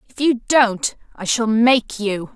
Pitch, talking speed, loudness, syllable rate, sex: 230 Hz, 180 wpm, -18 LUFS, 3.4 syllables/s, female